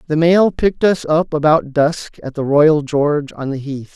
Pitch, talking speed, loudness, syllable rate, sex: 155 Hz, 215 wpm, -15 LUFS, 4.5 syllables/s, male